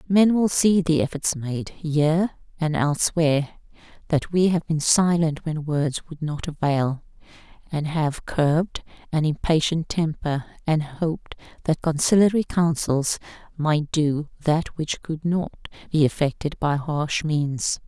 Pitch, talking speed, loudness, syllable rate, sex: 155 Hz, 140 wpm, -23 LUFS, 4.1 syllables/s, female